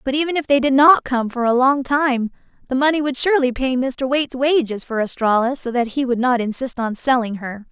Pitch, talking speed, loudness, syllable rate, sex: 260 Hz, 235 wpm, -18 LUFS, 5.5 syllables/s, female